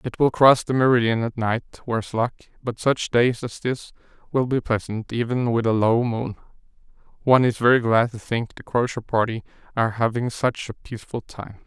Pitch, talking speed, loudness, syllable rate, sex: 120 Hz, 190 wpm, -22 LUFS, 5.2 syllables/s, male